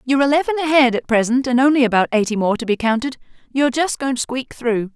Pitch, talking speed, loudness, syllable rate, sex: 255 Hz, 230 wpm, -18 LUFS, 6.7 syllables/s, female